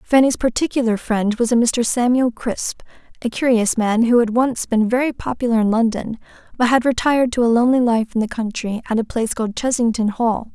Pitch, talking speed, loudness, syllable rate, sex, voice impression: 235 Hz, 200 wpm, -18 LUFS, 5.6 syllables/s, female, very feminine, young, very thin, tensed, slightly weak, bright, slightly soft, very clear, slightly fluent, very cute, intellectual, very refreshing, sincere, very calm, very friendly, very reassuring, unique, elegant, slightly wild, very sweet, lively, kind, slightly sharp, light